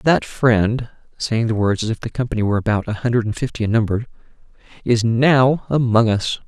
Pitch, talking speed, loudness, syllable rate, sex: 115 Hz, 195 wpm, -18 LUFS, 5.4 syllables/s, male